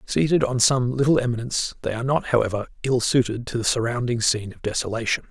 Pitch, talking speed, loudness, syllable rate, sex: 120 Hz, 190 wpm, -22 LUFS, 6.5 syllables/s, male